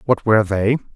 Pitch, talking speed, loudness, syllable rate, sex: 110 Hz, 190 wpm, -17 LUFS, 6.2 syllables/s, male